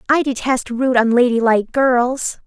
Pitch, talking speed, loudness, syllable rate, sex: 245 Hz, 120 wpm, -16 LUFS, 4.5 syllables/s, female